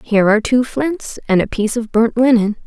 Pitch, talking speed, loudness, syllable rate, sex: 230 Hz, 225 wpm, -15 LUFS, 5.8 syllables/s, female